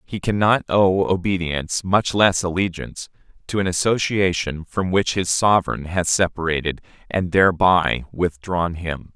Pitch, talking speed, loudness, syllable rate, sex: 90 Hz, 125 wpm, -20 LUFS, 4.6 syllables/s, male